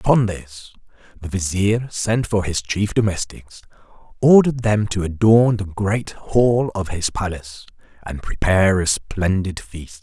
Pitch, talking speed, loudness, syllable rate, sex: 100 Hz, 145 wpm, -19 LUFS, 4.3 syllables/s, male